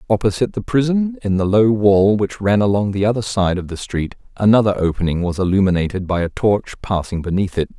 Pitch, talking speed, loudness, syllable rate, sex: 100 Hz, 200 wpm, -17 LUFS, 5.9 syllables/s, male